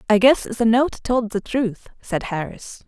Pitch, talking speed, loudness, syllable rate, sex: 225 Hz, 190 wpm, -20 LUFS, 4.0 syllables/s, female